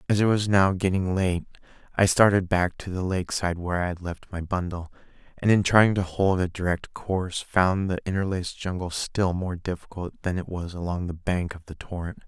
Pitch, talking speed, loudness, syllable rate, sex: 90 Hz, 205 wpm, -25 LUFS, 5.3 syllables/s, male